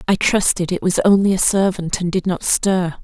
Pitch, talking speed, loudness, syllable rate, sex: 185 Hz, 215 wpm, -17 LUFS, 5.0 syllables/s, female